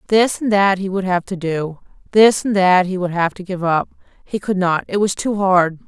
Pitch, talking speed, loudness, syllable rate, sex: 190 Hz, 235 wpm, -17 LUFS, 4.8 syllables/s, female